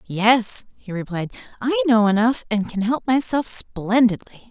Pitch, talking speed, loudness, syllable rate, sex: 225 Hz, 145 wpm, -20 LUFS, 4.1 syllables/s, female